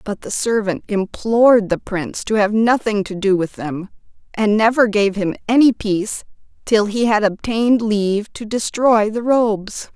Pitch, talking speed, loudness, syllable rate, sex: 215 Hz, 170 wpm, -17 LUFS, 4.7 syllables/s, female